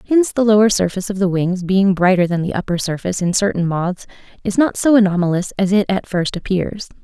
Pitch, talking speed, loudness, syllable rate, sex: 190 Hz, 215 wpm, -17 LUFS, 6.1 syllables/s, female